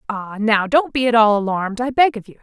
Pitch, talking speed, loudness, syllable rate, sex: 225 Hz, 270 wpm, -17 LUFS, 5.9 syllables/s, female